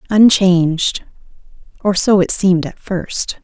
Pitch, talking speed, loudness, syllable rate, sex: 185 Hz, 105 wpm, -14 LUFS, 4.1 syllables/s, female